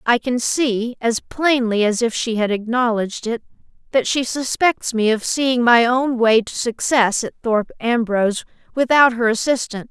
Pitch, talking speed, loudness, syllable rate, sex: 235 Hz, 170 wpm, -18 LUFS, 4.6 syllables/s, female